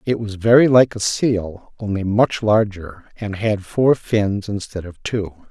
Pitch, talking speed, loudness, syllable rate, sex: 105 Hz, 175 wpm, -18 LUFS, 3.9 syllables/s, male